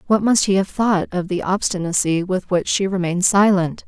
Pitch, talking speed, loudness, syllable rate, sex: 190 Hz, 200 wpm, -18 LUFS, 5.2 syllables/s, female